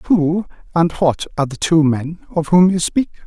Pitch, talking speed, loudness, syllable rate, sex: 165 Hz, 200 wpm, -17 LUFS, 4.6 syllables/s, male